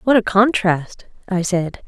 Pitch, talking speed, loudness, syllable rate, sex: 200 Hz, 160 wpm, -18 LUFS, 3.8 syllables/s, female